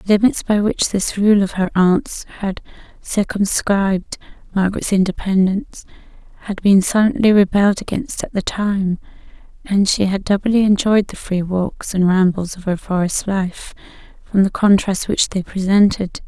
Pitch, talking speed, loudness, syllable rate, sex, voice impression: 195 Hz, 150 wpm, -17 LUFS, 4.6 syllables/s, female, feminine, slightly young, slightly dark, slightly cute, calm, kind, slightly modest